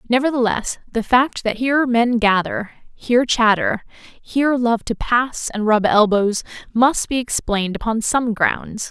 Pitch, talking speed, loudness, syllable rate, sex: 230 Hz, 150 wpm, -18 LUFS, 4.3 syllables/s, female